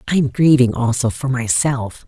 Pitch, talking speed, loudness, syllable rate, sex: 125 Hz, 175 wpm, -17 LUFS, 4.7 syllables/s, female